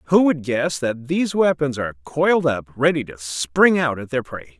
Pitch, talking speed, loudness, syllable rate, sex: 145 Hz, 210 wpm, -20 LUFS, 4.9 syllables/s, male